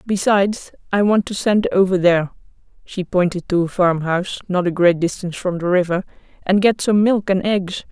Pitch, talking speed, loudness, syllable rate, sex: 185 Hz, 190 wpm, -18 LUFS, 5.4 syllables/s, female